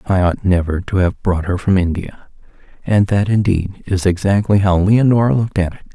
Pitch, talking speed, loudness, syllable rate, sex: 95 Hz, 190 wpm, -16 LUFS, 5.3 syllables/s, male